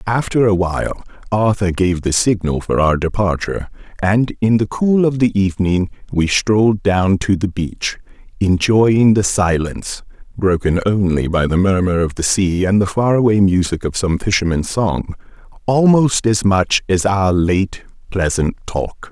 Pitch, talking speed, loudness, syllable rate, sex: 95 Hz, 160 wpm, -16 LUFS, 4.4 syllables/s, male